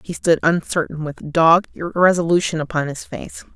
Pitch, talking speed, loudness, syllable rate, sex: 165 Hz, 150 wpm, -18 LUFS, 5.2 syllables/s, female